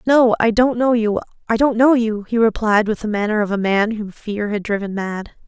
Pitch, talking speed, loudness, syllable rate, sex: 220 Hz, 230 wpm, -18 LUFS, 5.1 syllables/s, female